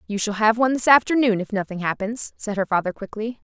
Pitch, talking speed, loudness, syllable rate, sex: 215 Hz, 220 wpm, -21 LUFS, 6.2 syllables/s, female